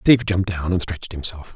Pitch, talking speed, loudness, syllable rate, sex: 90 Hz, 230 wpm, -22 LUFS, 6.6 syllables/s, male